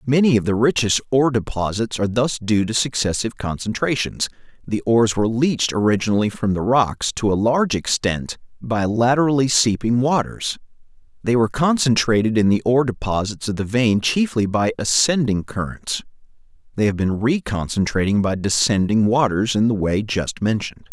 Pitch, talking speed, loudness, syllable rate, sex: 115 Hz, 155 wpm, -19 LUFS, 5.3 syllables/s, male